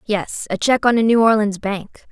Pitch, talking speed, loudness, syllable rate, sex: 215 Hz, 225 wpm, -17 LUFS, 4.9 syllables/s, female